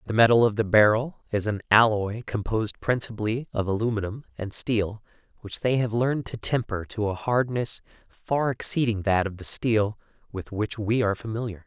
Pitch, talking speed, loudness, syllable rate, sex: 110 Hz, 175 wpm, -25 LUFS, 5.2 syllables/s, male